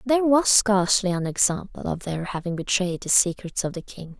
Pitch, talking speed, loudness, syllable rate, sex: 195 Hz, 200 wpm, -22 LUFS, 5.4 syllables/s, female